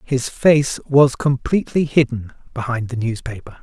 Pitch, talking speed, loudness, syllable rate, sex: 130 Hz, 130 wpm, -18 LUFS, 4.5 syllables/s, male